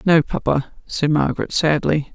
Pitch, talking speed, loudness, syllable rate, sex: 155 Hz, 140 wpm, -19 LUFS, 4.7 syllables/s, female